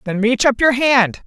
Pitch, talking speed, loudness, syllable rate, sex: 240 Hz, 240 wpm, -15 LUFS, 4.4 syllables/s, female